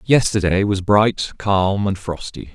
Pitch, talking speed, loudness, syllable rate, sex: 100 Hz, 140 wpm, -18 LUFS, 3.8 syllables/s, male